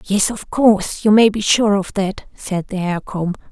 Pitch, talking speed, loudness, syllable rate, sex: 200 Hz, 220 wpm, -17 LUFS, 4.4 syllables/s, female